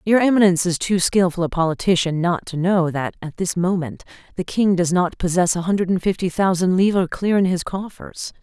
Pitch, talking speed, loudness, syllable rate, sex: 180 Hz, 205 wpm, -19 LUFS, 5.5 syllables/s, female